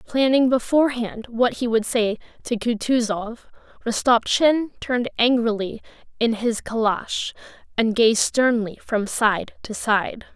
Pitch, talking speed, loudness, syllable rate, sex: 230 Hz, 120 wpm, -21 LUFS, 4.2 syllables/s, female